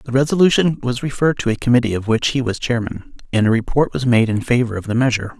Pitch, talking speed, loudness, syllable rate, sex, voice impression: 120 Hz, 245 wpm, -18 LUFS, 6.6 syllables/s, male, very masculine, very adult-like, slightly old, very thick, tensed, very powerful, slightly dark, slightly hard, slightly muffled, fluent, slightly raspy, cool, intellectual, sincere, calm, very mature, friendly, reassuring, unique, very wild, sweet, kind, slightly modest